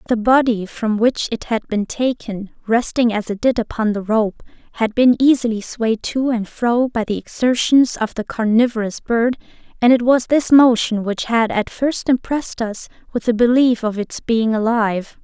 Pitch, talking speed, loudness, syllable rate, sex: 230 Hz, 185 wpm, -17 LUFS, 4.6 syllables/s, female